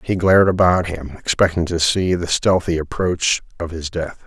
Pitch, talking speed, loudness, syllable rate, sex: 85 Hz, 185 wpm, -18 LUFS, 4.9 syllables/s, male